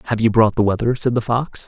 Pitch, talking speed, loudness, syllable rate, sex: 115 Hz, 285 wpm, -17 LUFS, 6.2 syllables/s, male